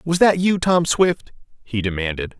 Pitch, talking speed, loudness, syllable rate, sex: 150 Hz, 175 wpm, -19 LUFS, 4.4 syllables/s, male